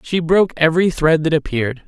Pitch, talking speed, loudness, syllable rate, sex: 160 Hz, 195 wpm, -16 LUFS, 6.4 syllables/s, male